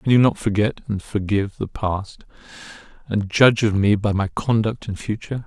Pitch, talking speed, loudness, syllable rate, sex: 105 Hz, 185 wpm, -21 LUFS, 5.3 syllables/s, male